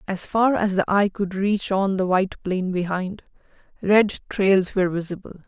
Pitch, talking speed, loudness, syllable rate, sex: 190 Hz, 175 wpm, -22 LUFS, 4.7 syllables/s, female